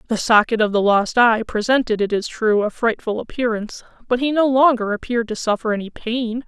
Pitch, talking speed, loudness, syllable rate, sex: 230 Hz, 205 wpm, -19 LUFS, 5.6 syllables/s, female